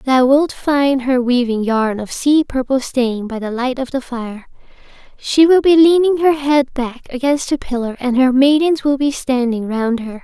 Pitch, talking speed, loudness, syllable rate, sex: 260 Hz, 200 wpm, -15 LUFS, 4.4 syllables/s, female